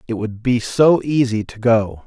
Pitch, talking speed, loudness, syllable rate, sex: 115 Hz, 205 wpm, -17 LUFS, 4.2 syllables/s, male